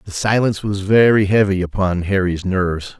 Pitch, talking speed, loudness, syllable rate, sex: 95 Hz, 160 wpm, -17 LUFS, 5.3 syllables/s, male